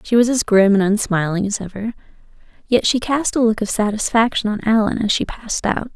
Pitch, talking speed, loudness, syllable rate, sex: 220 Hz, 210 wpm, -18 LUFS, 5.7 syllables/s, female